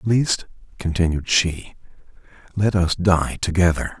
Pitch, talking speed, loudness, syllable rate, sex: 90 Hz, 120 wpm, -20 LUFS, 4.3 syllables/s, male